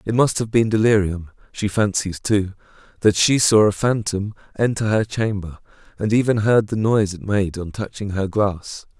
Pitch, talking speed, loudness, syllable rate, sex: 105 Hz, 180 wpm, -20 LUFS, 4.8 syllables/s, male